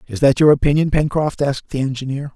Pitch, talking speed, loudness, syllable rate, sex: 140 Hz, 205 wpm, -17 LUFS, 6.4 syllables/s, male